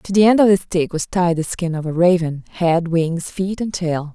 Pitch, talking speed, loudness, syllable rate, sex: 175 Hz, 245 wpm, -18 LUFS, 4.9 syllables/s, female